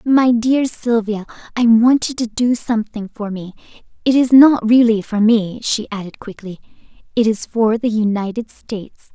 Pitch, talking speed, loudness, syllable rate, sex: 225 Hz, 170 wpm, -16 LUFS, 4.7 syllables/s, female